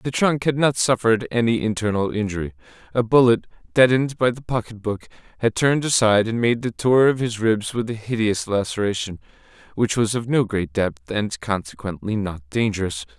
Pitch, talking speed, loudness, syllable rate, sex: 115 Hz, 175 wpm, -21 LUFS, 5.4 syllables/s, male